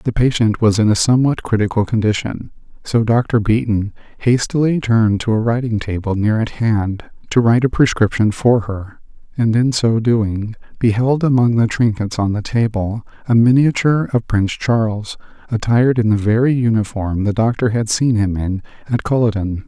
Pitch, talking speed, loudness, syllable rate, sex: 115 Hz, 170 wpm, -16 LUFS, 5.0 syllables/s, male